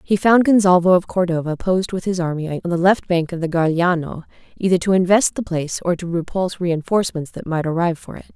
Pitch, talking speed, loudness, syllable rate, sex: 175 Hz, 225 wpm, -18 LUFS, 6.4 syllables/s, female